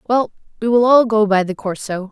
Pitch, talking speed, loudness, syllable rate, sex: 215 Hz, 200 wpm, -16 LUFS, 4.9 syllables/s, female